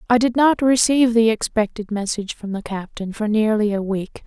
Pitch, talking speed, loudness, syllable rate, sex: 220 Hz, 195 wpm, -19 LUFS, 5.4 syllables/s, female